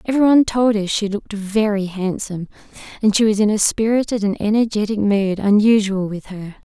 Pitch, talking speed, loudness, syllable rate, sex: 210 Hz, 170 wpm, -18 LUFS, 5.5 syllables/s, female